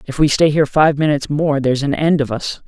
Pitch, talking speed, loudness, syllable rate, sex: 145 Hz, 270 wpm, -16 LUFS, 6.3 syllables/s, male